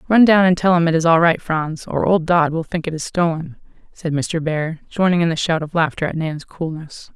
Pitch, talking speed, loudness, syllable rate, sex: 165 Hz, 250 wpm, -18 LUFS, 5.2 syllables/s, female